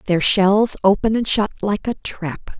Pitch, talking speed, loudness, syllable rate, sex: 200 Hz, 185 wpm, -18 LUFS, 4.0 syllables/s, female